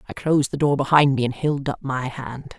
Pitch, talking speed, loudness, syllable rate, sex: 135 Hz, 255 wpm, -21 LUFS, 5.5 syllables/s, female